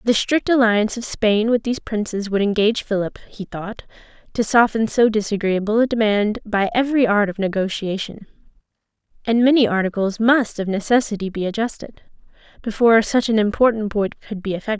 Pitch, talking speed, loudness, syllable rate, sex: 215 Hz, 160 wpm, -19 LUFS, 5.7 syllables/s, female